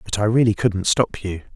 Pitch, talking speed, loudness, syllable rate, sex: 105 Hz, 230 wpm, -20 LUFS, 5.2 syllables/s, male